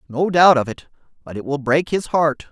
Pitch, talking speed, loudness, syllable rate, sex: 150 Hz, 240 wpm, -17 LUFS, 5.0 syllables/s, male